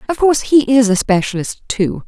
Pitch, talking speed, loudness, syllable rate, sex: 240 Hz, 205 wpm, -14 LUFS, 5.3 syllables/s, female